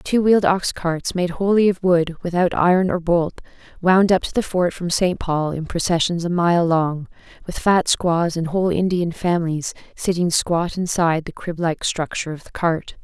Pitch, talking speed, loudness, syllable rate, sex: 175 Hz, 195 wpm, -20 LUFS, 4.8 syllables/s, female